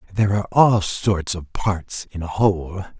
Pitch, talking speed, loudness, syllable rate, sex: 95 Hz, 180 wpm, -20 LUFS, 4.7 syllables/s, male